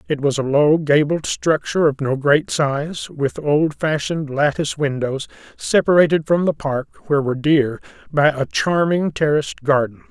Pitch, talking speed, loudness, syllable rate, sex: 150 Hz, 155 wpm, -18 LUFS, 4.9 syllables/s, male